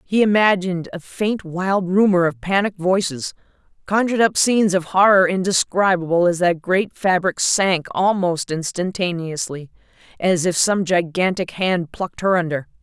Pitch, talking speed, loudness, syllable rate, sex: 180 Hz, 140 wpm, -19 LUFS, 4.7 syllables/s, female